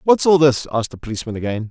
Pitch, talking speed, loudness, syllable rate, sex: 130 Hz, 245 wpm, -18 LUFS, 7.6 syllables/s, male